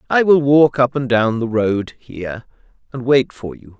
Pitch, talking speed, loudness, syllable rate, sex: 125 Hz, 205 wpm, -16 LUFS, 4.5 syllables/s, male